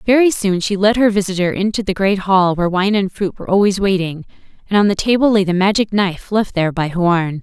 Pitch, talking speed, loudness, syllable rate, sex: 195 Hz, 235 wpm, -16 LUFS, 6.0 syllables/s, female